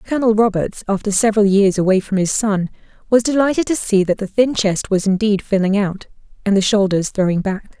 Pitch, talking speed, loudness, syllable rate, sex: 205 Hz, 200 wpm, -17 LUFS, 5.7 syllables/s, female